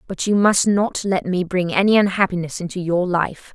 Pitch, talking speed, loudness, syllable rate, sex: 185 Hz, 205 wpm, -19 LUFS, 5.1 syllables/s, female